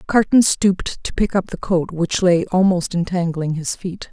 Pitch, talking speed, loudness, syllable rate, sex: 180 Hz, 190 wpm, -18 LUFS, 4.5 syllables/s, female